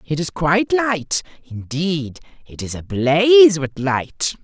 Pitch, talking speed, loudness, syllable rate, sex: 165 Hz, 135 wpm, -17 LUFS, 3.7 syllables/s, male